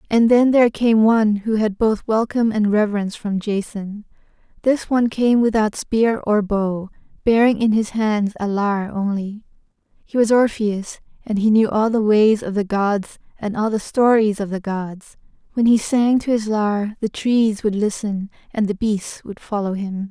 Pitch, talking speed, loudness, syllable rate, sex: 215 Hz, 185 wpm, -19 LUFS, 4.7 syllables/s, female